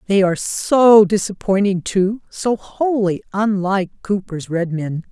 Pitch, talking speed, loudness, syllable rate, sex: 200 Hz, 115 wpm, -17 LUFS, 4.1 syllables/s, female